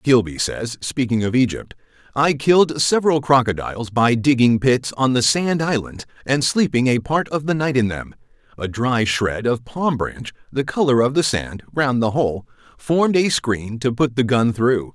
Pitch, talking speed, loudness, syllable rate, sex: 130 Hz, 190 wpm, -19 LUFS, 4.6 syllables/s, male